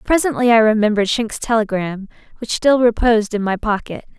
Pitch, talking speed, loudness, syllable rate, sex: 220 Hz, 160 wpm, -17 LUFS, 5.7 syllables/s, female